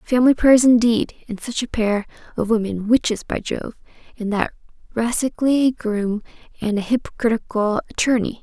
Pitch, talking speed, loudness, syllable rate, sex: 230 Hz, 130 wpm, -20 LUFS, 5.1 syllables/s, female